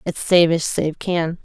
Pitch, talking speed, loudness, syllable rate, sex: 165 Hz, 210 wpm, -18 LUFS, 3.9 syllables/s, female